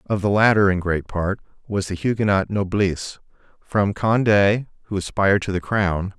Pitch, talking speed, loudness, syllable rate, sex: 100 Hz, 165 wpm, -20 LUFS, 4.9 syllables/s, male